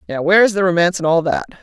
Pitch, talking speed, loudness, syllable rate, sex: 175 Hz, 295 wpm, -15 LUFS, 8.5 syllables/s, female